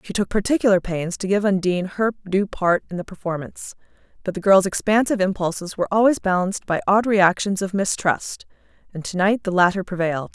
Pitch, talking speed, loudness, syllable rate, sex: 190 Hz, 185 wpm, -20 LUFS, 6.0 syllables/s, female